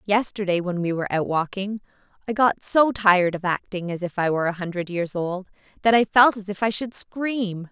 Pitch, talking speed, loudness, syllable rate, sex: 195 Hz, 220 wpm, -22 LUFS, 5.3 syllables/s, female